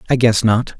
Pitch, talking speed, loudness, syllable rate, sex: 115 Hz, 225 wpm, -15 LUFS, 5.6 syllables/s, male